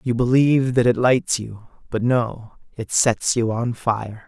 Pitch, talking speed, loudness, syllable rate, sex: 120 Hz, 180 wpm, -20 LUFS, 4.0 syllables/s, male